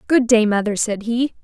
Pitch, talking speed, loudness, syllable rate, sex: 230 Hz, 210 wpm, -18 LUFS, 4.9 syllables/s, female